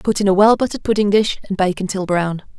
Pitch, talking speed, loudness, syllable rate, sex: 195 Hz, 255 wpm, -17 LUFS, 6.4 syllables/s, female